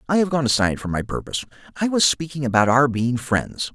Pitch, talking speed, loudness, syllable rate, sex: 135 Hz, 225 wpm, -21 LUFS, 6.3 syllables/s, male